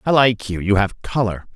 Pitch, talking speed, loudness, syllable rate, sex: 110 Hz, 195 wpm, -19 LUFS, 5.0 syllables/s, male